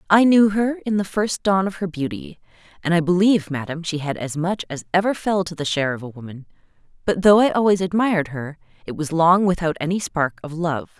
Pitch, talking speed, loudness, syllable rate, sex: 170 Hz, 225 wpm, -20 LUFS, 5.8 syllables/s, female